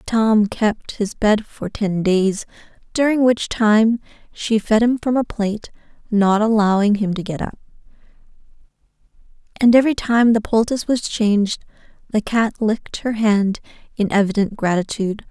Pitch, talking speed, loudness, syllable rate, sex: 215 Hz, 145 wpm, -18 LUFS, 4.7 syllables/s, female